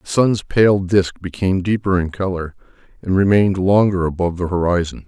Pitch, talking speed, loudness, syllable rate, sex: 95 Hz, 165 wpm, -17 LUFS, 5.5 syllables/s, male